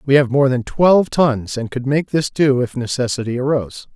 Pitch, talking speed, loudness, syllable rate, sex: 135 Hz, 210 wpm, -17 LUFS, 5.3 syllables/s, male